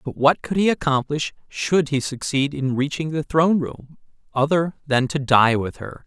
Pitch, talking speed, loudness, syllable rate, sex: 145 Hz, 190 wpm, -21 LUFS, 4.7 syllables/s, male